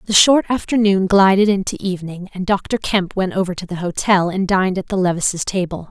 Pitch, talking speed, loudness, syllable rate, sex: 190 Hz, 205 wpm, -17 LUFS, 5.6 syllables/s, female